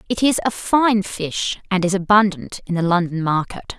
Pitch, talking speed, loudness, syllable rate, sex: 190 Hz, 190 wpm, -19 LUFS, 4.7 syllables/s, female